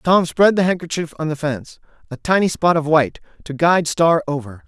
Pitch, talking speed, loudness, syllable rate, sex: 160 Hz, 195 wpm, -18 LUFS, 5.9 syllables/s, male